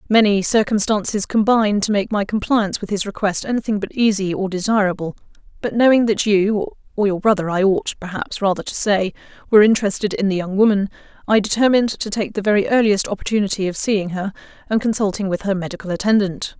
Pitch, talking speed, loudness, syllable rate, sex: 205 Hz, 175 wpm, -18 LUFS, 6.2 syllables/s, female